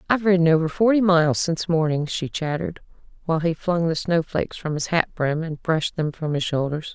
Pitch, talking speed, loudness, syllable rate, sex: 165 Hz, 215 wpm, -22 LUFS, 6.1 syllables/s, female